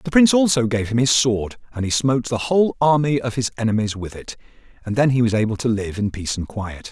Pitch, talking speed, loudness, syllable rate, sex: 120 Hz, 250 wpm, -19 LUFS, 6.3 syllables/s, male